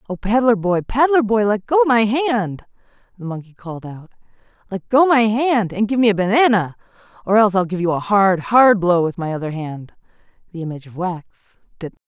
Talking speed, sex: 215 wpm, female